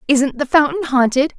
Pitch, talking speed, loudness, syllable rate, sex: 280 Hz, 175 wpm, -16 LUFS, 5.0 syllables/s, female